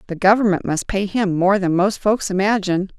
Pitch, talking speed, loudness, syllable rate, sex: 195 Hz, 200 wpm, -18 LUFS, 5.4 syllables/s, female